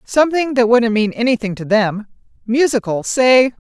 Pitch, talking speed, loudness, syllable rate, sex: 235 Hz, 145 wpm, -15 LUFS, 4.9 syllables/s, female